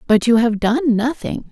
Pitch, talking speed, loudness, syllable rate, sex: 240 Hz, 200 wpm, -17 LUFS, 4.8 syllables/s, female